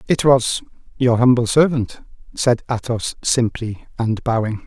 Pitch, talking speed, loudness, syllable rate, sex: 120 Hz, 130 wpm, -18 LUFS, 4.1 syllables/s, male